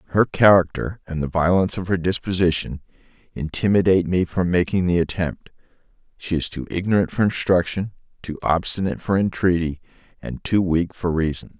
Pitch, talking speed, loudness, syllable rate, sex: 90 Hz, 150 wpm, -21 LUFS, 5.6 syllables/s, male